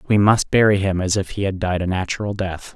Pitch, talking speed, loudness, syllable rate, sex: 95 Hz, 260 wpm, -19 LUFS, 5.8 syllables/s, male